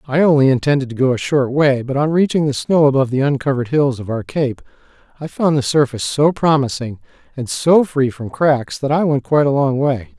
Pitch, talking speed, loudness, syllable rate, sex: 140 Hz, 225 wpm, -16 LUFS, 5.7 syllables/s, male